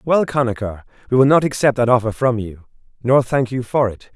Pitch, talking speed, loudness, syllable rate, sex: 125 Hz, 215 wpm, -18 LUFS, 5.5 syllables/s, male